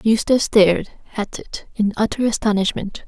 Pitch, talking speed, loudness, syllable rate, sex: 210 Hz, 135 wpm, -19 LUFS, 5.2 syllables/s, female